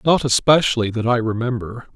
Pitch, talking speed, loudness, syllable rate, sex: 120 Hz, 155 wpm, -18 LUFS, 5.7 syllables/s, male